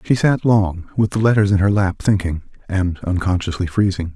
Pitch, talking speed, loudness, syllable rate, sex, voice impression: 95 Hz, 175 wpm, -18 LUFS, 5.2 syllables/s, male, very masculine, middle-aged, thick, muffled, cool, slightly calm, wild